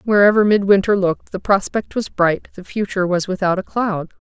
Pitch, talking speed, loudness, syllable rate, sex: 195 Hz, 185 wpm, -18 LUFS, 5.5 syllables/s, female